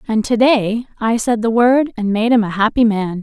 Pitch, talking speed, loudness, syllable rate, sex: 225 Hz, 240 wpm, -15 LUFS, 5.2 syllables/s, female